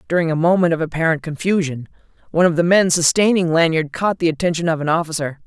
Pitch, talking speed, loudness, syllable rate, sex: 165 Hz, 200 wpm, -17 LUFS, 6.6 syllables/s, female